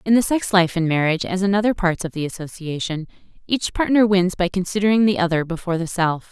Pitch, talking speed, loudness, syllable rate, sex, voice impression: 185 Hz, 220 wpm, -20 LUFS, 6.2 syllables/s, female, feminine, slightly adult-like, clear, fluent, slightly intellectual, slightly refreshing, friendly